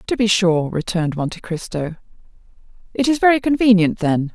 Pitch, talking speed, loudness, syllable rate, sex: 195 Hz, 150 wpm, -18 LUFS, 5.6 syllables/s, female